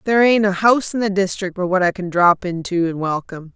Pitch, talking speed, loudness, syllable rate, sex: 190 Hz, 255 wpm, -18 LUFS, 6.1 syllables/s, female